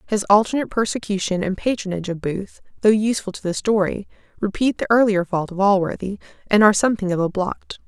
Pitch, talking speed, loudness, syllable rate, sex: 200 Hz, 185 wpm, -20 LUFS, 6.3 syllables/s, female